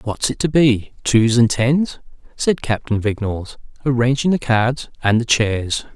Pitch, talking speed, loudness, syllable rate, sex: 120 Hz, 150 wpm, -18 LUFS, 4.2 syllables/s, male